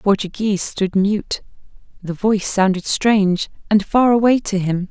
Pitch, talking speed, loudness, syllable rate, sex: 200 Hz, 145 wpm, -17 LUFS, 4.6 syllables/s, female